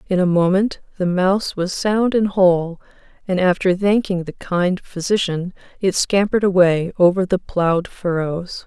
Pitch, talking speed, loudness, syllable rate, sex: 185 Hz, 150 wpm, -18 LUFS, 4.6 syllables/s, female